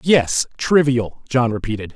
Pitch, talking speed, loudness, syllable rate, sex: 125 Hz, 125 wpm, -18 LUFS, 4.1 syllables/s, male